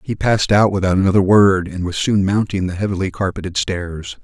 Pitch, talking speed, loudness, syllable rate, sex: 95 Hz, 200 wpm, -17 LUFS, 5.6 syllables/s, male